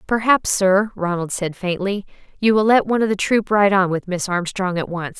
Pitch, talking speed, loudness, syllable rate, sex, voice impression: 195 Hz, 220 wpm, -19 LUFS, 5.1 syllables/s, female, feminine, slightly adult-like, sincere, slightly calm, slightly friendly